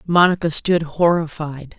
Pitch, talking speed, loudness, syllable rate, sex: 160 Hz, 100 wpm, -18 LUFS, 4.2 syllables/s, female